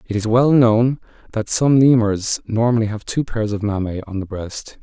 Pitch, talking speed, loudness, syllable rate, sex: 110 Hz, 200 wpm, -18 LUFS, 4.7 syllables/s, male